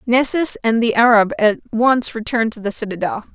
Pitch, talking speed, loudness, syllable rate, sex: 230 Hz, 180 wpm, -16 LUFS, 5.2 syllables/s, female